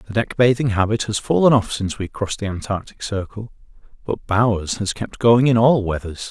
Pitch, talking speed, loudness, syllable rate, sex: 110 Hz, 200 wpm, -19 LUFS, 5.4 syllables/s, male